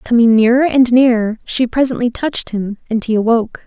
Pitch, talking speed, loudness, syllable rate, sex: 235 Hz, 180 wpm, -14 LUFS, 5.6 syllables/s, female